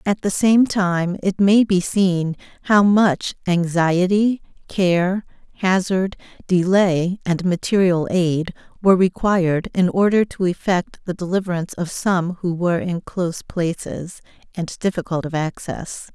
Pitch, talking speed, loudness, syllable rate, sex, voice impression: 185 Hz, 135 wpm, -19 LUFS, 4.2 syllables/s, female, slightly feminine, very gender-neutral, very adult-like, middle-aged, slightly thick, tensed, slightly weak, slightly bright, slightly hard, slightly raspy, very intellectual, very sincere, very calm, slightly wild, kind, slightly modest